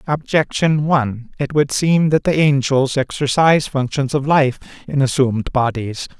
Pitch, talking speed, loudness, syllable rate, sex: 140 Hz, 145 wpm, -17 LUFS, 4.6 syllables/s, male